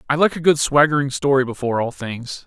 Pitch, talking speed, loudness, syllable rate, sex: 140 Hz, 220 wpm, -18 LUFS, 6.1 syllables/s, male